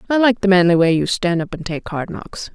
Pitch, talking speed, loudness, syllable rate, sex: 185 Hz, 285 wpm, -17 LUFS, 5.5 syllables/s, female